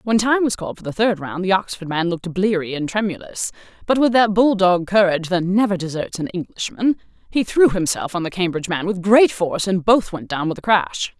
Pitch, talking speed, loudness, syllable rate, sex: 190 Hz, 230 wpm, -19 LUFS, 5.7 syllables/s, female